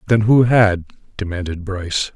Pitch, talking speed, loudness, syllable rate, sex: 100 Hz, 140 wpm, -17 LUFS, 4.7 syllables/s, male